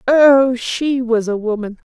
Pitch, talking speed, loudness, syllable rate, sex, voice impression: 245 Hz, 155 wpm, -15 LUFS, 3.6 syllables/s, female, very feminine, adult-like, slightly middle-aged, very thin, tensed, slightly powerful, bright, very hard, very clear, fluent, slightly raspy, slightly cute, cool, intellectual, refreshing, very sincere, calm, slightly friendly, slightly reassuring, very unique, slightly elegant, slightly wild, slightly sweet, lively, strict, slightly intense, very sharp, slightly light